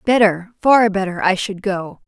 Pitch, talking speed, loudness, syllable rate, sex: 200 Hz, 115 wpm, -17 LUFS, 4.4 syllables/s, female